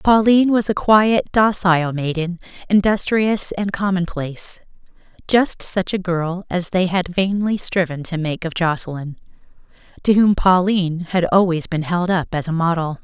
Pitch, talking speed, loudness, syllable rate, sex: 180 Hz, 145 wpm, -18 LUFS, 4.6 syllables/s, female